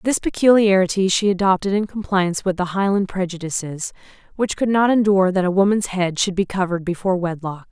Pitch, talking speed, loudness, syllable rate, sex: 190 Hz, 180 wpm, -19 LUFS, 6.0 syllables/s, female